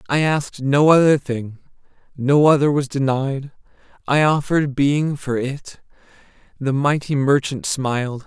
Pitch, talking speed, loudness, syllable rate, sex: 140 Hz, 130 wpm, -19 LUFS, 4.4 syllables/s, male